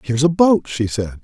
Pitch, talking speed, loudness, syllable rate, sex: 140 Hz, 245 wpm, -17 LUFS, 5.3 syllables/s, male